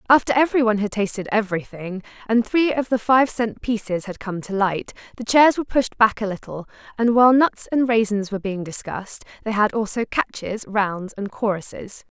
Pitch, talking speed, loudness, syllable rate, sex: 220 Hz, 190 wpm, -21 LUFS, 5.5 syllables/s, female